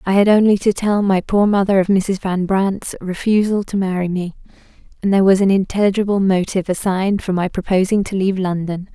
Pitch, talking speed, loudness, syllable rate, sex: 195 Hz, 195 wpm, -17 LUFS, 5.8 syllables/s, female